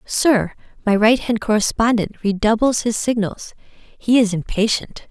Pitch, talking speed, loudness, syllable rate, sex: 220 Hz, 120 wpm, -18 LUFS, 4.2 syllables/s, female